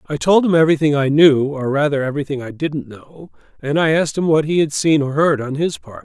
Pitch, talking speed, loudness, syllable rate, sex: 150 Hz, 240 wpm, -16 LUFS, 5.8 syllables/s, male